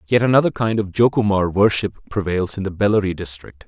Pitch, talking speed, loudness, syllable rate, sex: 100 Hz, 180 wpm, -19 LUFS, 6.0 syllables/s, male